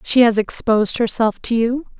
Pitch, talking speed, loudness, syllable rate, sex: 230 Hz, 180 wpm, -17 LUFS, 4.9 syllables/s, female